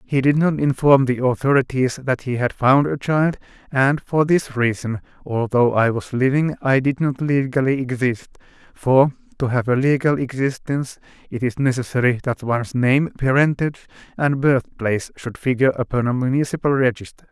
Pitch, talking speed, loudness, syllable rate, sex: 130 Hz, 160 wpm, -19 LUFS, 5.1 syllables/s, male